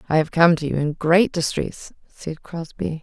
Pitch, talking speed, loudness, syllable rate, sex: 165 Hz, 200 wpm, -20 LUFS, 4.5 syllables/s, female